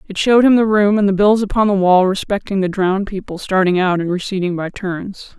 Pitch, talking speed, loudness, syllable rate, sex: 195 Hz, 235 wpm, -16 LUFS, 5.7 syllables/s, female